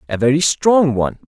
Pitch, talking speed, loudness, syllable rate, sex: 140 Hz, 185 wpm, -15 LUFS, 5.8 syllables/s, male